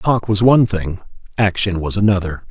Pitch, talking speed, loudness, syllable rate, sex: 100 Hz, 170 wpm, -16 LUFS, 5.3 syllables/s, male